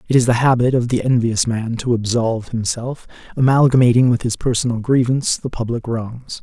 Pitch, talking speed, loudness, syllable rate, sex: 120 Hz, 175 wpm, -17 LUFS, 5.5 syllables/s, male